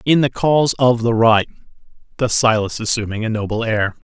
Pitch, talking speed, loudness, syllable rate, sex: 115 Hz, 175 wpm, -17 LUFS, 5.5 syllables/s, male